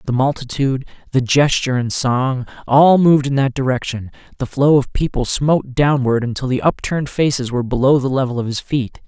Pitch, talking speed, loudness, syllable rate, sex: 130 Hz, 185 wpm, -17 LUFS, 5.7 syllables/s, male